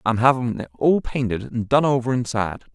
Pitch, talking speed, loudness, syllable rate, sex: 120 Hz, 195 wpm, -21 LUFS, 5.7 syllables/s, male